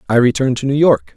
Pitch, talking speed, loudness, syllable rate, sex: 135 Hz, 260 wpm, -14 LUFS, 7.2 syllables/s, male